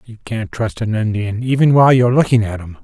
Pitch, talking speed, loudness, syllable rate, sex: 115 Hz, 255 wpm, -15 LUFS, 6.4 syllables/s, male